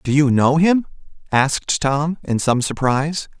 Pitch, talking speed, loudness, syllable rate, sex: 145 Hz, 160 wpm, -18 LUFS, 4.3 syllables/s, male